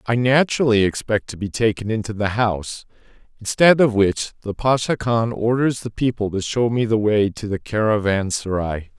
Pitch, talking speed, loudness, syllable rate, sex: 110 Hz, 175 wpm, -20 LUFS, 5.0 syllables/s, male